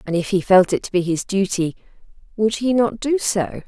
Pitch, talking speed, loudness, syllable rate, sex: 200 Hz, 230 wpm, -19 LUFS, 5.1 syllables/s, female